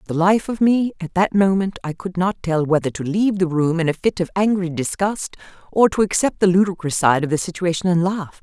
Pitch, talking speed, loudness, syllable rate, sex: 180 Hz, 240 wpm, -19 LUFS, 5.7 syllables/s, female